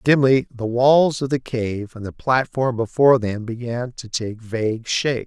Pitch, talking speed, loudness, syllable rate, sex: 120 Hz, 180 wpm, -20 LUFS, 4.5 syllables/s, male